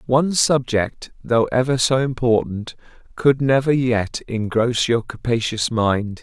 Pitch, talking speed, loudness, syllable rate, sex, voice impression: 120 Hz, 125 wpm, -19 LUFS, 3.9 syllables/s, male, masculine, adult-like, slightly halting, cool, intellectual, slightly mature, slightly sweet